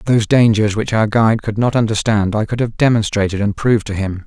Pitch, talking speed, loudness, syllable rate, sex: 110 Hz, 225 wpm, -16 LUFS, 6.1 syllables/s, male